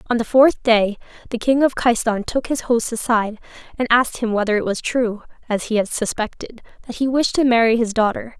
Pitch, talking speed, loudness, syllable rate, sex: 230 Hz, 215 wpm, -19 LUFS, 5.6 syllables/s, female